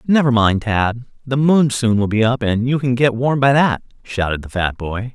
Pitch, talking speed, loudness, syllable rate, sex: 120 Hz, 235 wpm, -17 LUFS, 4.8 syllables/s, male